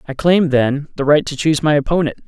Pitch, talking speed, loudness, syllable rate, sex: 150 Hz, 240 wpm, -16 LUFS, 5.9 syllables/s, male